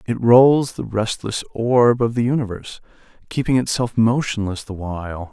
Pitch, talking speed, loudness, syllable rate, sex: 115 Hz, 145 wpm, -19 LUFS, 4.8 syllables/s, male